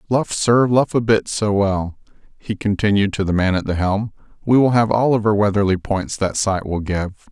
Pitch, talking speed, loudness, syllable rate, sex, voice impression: 105 Hz, 220 wpm, -18 LUFS, 4.9 syllables/s, male, masculine, very adult-like, thick, cool, intellectual, slightly refreshing, reassuring, slightly wild